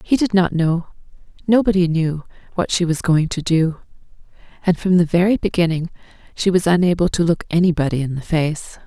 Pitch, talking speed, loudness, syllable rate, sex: 170 Hz, 175 wpm, -18 LUFS, 5.5 syllables/s, female